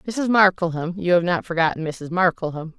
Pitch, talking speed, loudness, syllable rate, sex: 175 Hz, 150 wpm, -21 LUFS, 5.2 syllables/s, female